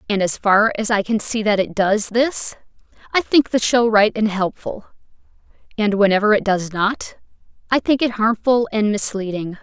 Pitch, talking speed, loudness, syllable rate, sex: 215 Hz, 180 wpm, -18 LUFS, 4.7 syllables/s, female